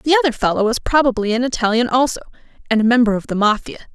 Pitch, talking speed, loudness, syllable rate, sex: 240 Hz, 215 wpm, -17 LUFS, 7.1 syllables/s, female